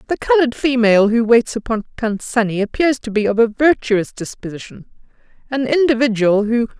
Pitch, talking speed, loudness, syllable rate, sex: 235 Hz, 160 wpm, -16 LUFS, 5.5 syllables/s, female